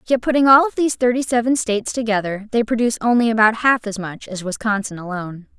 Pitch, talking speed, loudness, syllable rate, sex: 225 Hz, 205 wpm, -18 LUFS, 6.5 syllables/s, female